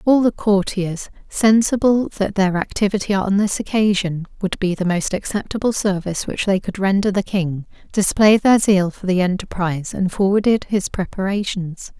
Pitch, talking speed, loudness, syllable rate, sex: 195 Hz, 160 wpm, -19 LUFS, 4.9 syllables/s, female